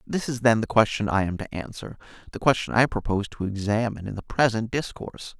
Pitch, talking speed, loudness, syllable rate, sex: 110 Hz, 210 wpm, -24 LUFS, 6.2 syllables/s, male